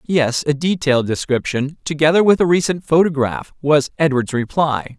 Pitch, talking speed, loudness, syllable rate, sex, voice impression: 150 Hz, 145 wpm, -17 LUFS, 5.0 syllables/s, male, masculine, adult-like, tensed, powerful, bright, clear, fluent, intellectual, friendly, unique, lively, slightly light